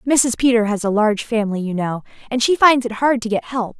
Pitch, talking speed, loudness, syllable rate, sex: 230 Hz, 255 wpm, -18 LUFS, 6.0 syllables/s, female